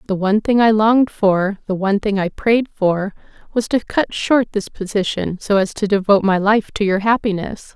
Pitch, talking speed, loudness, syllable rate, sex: 205 Hz, 210 wpm, -17 LUFS, 5.2 syllables/s, female